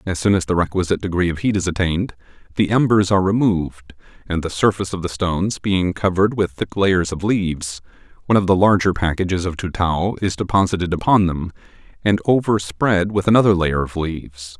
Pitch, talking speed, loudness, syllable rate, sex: 95 Hz, 185 wpm, -19 LUFS, 5.9 syllables/s, male